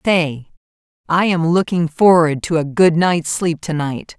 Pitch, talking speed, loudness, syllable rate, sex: 165 Hz, 170 wpm, -16 LUFS, 4.0 syllables/s, female